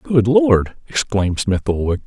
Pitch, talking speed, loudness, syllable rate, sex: 105 Hz, 145 wpm, -17 LUFS, 4.4 syllables/s, male